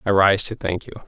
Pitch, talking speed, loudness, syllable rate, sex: 100 Hz, 280 wpm, -20 LUFS, 6.0 syllables/s, male